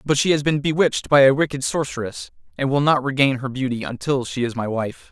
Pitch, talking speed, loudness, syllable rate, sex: 135 Hz, 235 wpm, -20 LUFS, 5.9 syllables/s, male